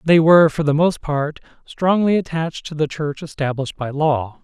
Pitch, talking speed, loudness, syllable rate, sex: 155 Hz, 190 wpm, -18 LUFS, 5.2 syllables/s, male